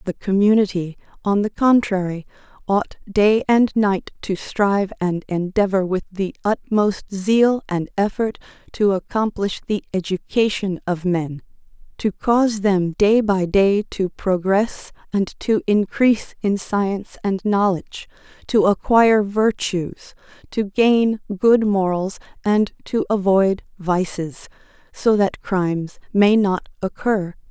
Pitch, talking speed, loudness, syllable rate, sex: 200 Hz, 125 wpm, -20 LUFS, 3.9 syllables/s, female